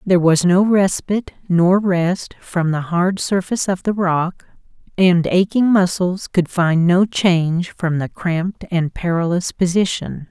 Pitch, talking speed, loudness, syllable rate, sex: 180 Hz, 150 wpm, -17 LUFS, 4.1 syllables/s, female